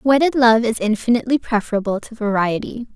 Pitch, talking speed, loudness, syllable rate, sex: 230 Hz, 140 wpm, -18 LUFS, 5.9 syllables/s, female